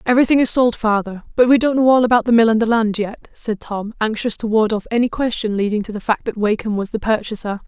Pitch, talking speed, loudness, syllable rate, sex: 225 Hz, 260 wpm, -17 LUFS, 6.2 syllables/s, female